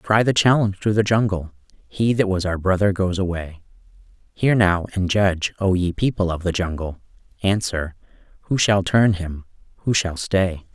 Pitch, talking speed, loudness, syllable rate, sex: 95 Hz, 170 wpm, -20 LUFS, 4.9 syllables/s, male